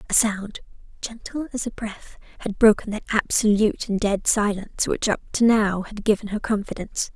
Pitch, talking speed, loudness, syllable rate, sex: 210 Hz, 160 wpm, -22 LUFS, 5.3 syllables/s, female